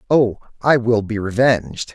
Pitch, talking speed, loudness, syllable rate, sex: 115 Hz, 155 wpm, -18 LUFS, 4.6 syllables/s, male